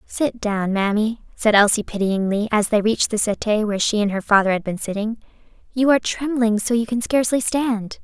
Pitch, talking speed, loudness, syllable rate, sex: 220 Hz, 200 wpm, -20 LUFS, 5.5 syllables/s, female